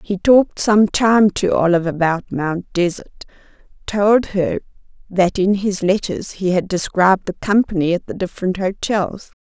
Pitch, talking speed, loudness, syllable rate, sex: 190 Hz, 155 wpm, -17 LUFS, 4.6 syllables/s, female